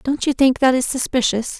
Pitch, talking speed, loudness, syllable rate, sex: 260 Hz, 225 wpm, -18 LUFS, 5.4 syllables/s, female